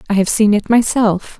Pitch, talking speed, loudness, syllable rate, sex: 210 Hz, 215 wpm, -14 LUFS, 5.0 syllables/s, female